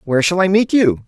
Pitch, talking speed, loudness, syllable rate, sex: 170 Hz, 280 wpm, -15 LUFS, 6.3 syllables/s, male